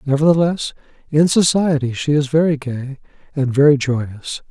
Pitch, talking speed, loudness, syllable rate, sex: 145 Hz, 135 wpm, -17 LUFS, 4.7 syllables/s, male